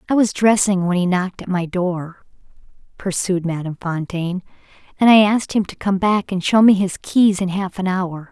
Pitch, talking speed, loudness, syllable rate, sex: 190 Hz, 200 wpm, -18 LUFS, 5.3 syllables/s, female